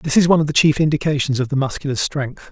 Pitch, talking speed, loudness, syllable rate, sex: 145 Hz, 265 wpm, -18 LUFS, 6.9 syllables/s, male